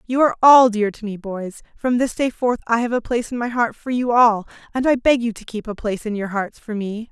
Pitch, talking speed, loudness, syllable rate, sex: 230 Hz, 285 wpm, -19 LUFS, 5.8 syllables/s, female